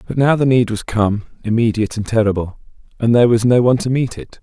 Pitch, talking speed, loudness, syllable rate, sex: 115 Hz, 230 wpm, -16 LUFS, 6.5 syllables/s, male